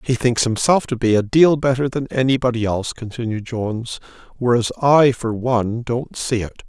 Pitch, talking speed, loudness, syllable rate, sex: 120 Hz, 180 wpm, -19 LUFS, 5.1 syllables/s, male